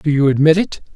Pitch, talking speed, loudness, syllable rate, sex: 150 Hz, 250 wpm, -14 LUFS, 6.2 syllables/s, male